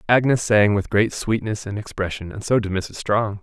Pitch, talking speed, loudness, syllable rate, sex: 105 Hz, 210 wpm, -21 LUFS, 4.9 syllables/s, male